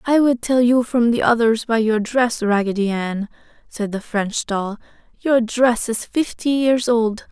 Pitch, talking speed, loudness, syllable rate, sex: 230 Hz, 180 wpm, -19 LUFS, 4.0 syllables/s, female